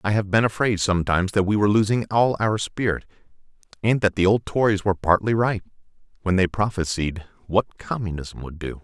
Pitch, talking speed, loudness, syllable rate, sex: 100 Hz, 185 wpm, -22 LUFS, 5.8 syllables/s, male